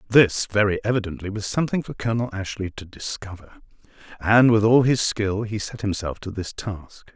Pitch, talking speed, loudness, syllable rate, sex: 105 Hz, 175 wpm, -22 LUFS, 5.4 syllables/s, male